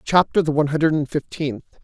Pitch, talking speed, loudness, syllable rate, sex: 150 Hz, 195 wpm, -20 LUFS, 6.4 syllables/s, male